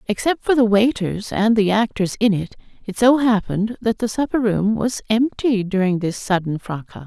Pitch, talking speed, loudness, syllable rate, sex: 215 Hz, 185 wpm, -19 LUFS, 5.0 syllables/s, female